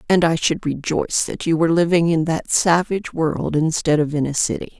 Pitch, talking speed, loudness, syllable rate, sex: 160 Hz, 215 wpm, -19 LUFS, 5.5 syllables/s, female